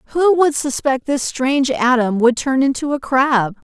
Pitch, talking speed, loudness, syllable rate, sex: 270 Hz, 180 wpm, -16 LUFS, 4.6 syllables/s, female